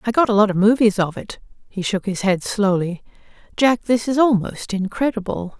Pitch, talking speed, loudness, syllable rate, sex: 215 Hz, 195 wpm, -19 LUFS, 5.1 syllables/s, female